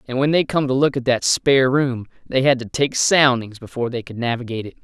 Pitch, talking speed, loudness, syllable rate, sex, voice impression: 130 Hz, 250 wpm, -19 LUFS, 6.0 syllables/s, male, masculine, adult-like, slightly thick, fluent, slightly sincere, slightly unique